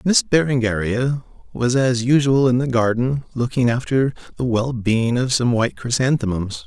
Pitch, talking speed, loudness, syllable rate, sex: 125 Hz, 145 wpm, -19 LUFS, 4.7 syllables/s, male